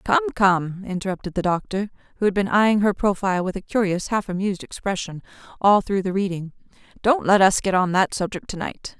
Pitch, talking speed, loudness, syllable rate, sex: 195 Hz, 200 wpm, -22 LUFS, 5.7 syllables/s, female